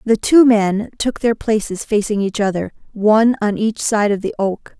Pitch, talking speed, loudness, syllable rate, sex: 215 Hz, 200 wpm, -16 LUFS, 4.6 syllables/s, female